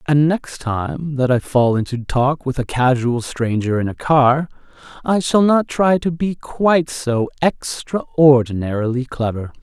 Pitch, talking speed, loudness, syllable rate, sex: 135 Hz, 155 wpm, -18 LUFS, 4.0 syllables/s, male